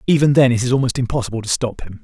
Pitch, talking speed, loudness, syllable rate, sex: 125 Hz, 265 wpm, -17 LUFS, 7.4 syllables/s, male